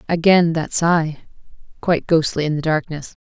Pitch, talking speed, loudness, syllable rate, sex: 160 Hz, 130 wpm, -18 LUFS, 5.0 syllables/s, female